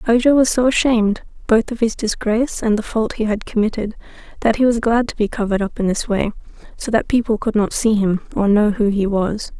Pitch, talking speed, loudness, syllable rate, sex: 220 Hz, 230 wpm, -18 LUFS, 5.8 syllables/s, female